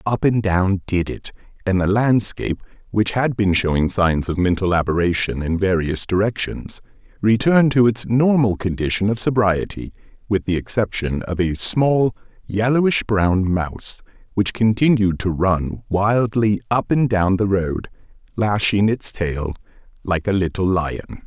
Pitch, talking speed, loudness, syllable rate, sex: 100 Hz, 145 wpm, -19 LUFS, 4.5 syllables/s, male